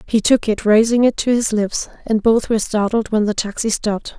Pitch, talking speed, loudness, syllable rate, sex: 220 Hz, 230 wpm, -17 LUFS, 5.4 syllables/s, female